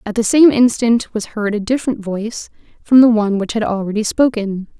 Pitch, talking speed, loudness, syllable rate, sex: 220 Hz, 200 wpm, -15 LUFS, 5.6 syllables/s, female